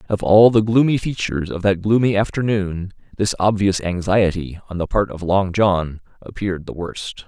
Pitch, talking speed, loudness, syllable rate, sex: 100 Hz, 175 wpm, -19 LUFS, 4.9 syllables/s, male